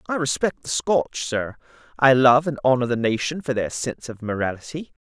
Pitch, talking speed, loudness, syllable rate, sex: 135 Hz, 190 wpm, -22 LUFS, 5.2 syllables/s, male